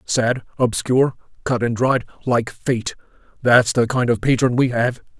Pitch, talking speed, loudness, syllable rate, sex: 120 Hz, 150 wpm, -19 LUFS, 4.5 syllables/s, male